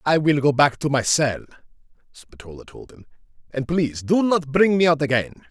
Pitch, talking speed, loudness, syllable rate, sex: 145 Hz, 195 wpm, -20 LUFS, 5.3 syllables/s, male